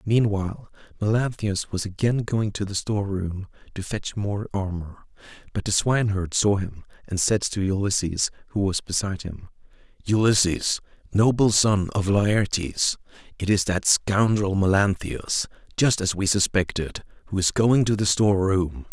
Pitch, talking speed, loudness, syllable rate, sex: 100 Hz, 150 wpm, -23 LUFS, 4.6 syllables/s, male